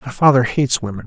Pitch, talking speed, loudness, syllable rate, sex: 125 Hz, 225 wpm, -16 LUFS, 7.5 syllables/s, male